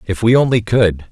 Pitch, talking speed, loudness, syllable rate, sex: 110 Hz, 215 wpm, -14 LUFS, 5.0 syllables/s, male